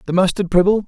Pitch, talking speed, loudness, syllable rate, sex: 185 Hz, 205 wpm, -16 LUFS, 7.0 syllables/s, male